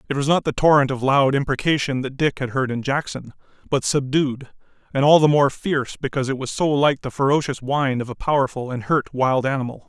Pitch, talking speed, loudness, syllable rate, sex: 135 Hz, 220 wpm, -20 LUFS, 5.9 syllables/s, male